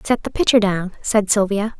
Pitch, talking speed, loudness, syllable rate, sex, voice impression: 210 Hz, 200 wpm, -18 LUFS, 5.0 syllables/s, female, very feminine, young, slightly soft, slightly clear, cute, slightly refreshing, friendly, slightly reassuring